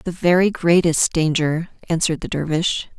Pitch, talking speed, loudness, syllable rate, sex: 165 Hz, 140 wpm, -19 LUFS, 5.0 syllables/s, female